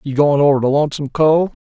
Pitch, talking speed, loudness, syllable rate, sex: 145 Hz, 220 wpm, -15 LUFS, 6.9 syllables/s, male